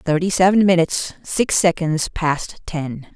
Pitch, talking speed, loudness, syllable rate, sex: 170 Hz, 135 wpm, -18 LUFS, 4.0 syllables/s, female